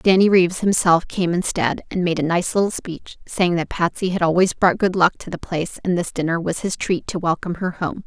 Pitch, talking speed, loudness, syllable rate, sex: 175 Hz, 240 wpm, -20 LUFS, 5.5 syllables/s, female